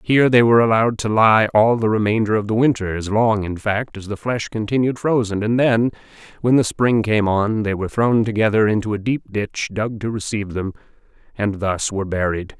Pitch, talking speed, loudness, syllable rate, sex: 110 Hz, 210 wpm, -18 LUFS, 5.5 syllables/s, male